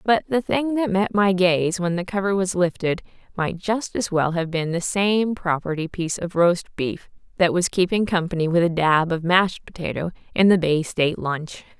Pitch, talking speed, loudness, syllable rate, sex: 180 Hz, 205 wpm, -21 LUFS, 4.8 syllables/s, female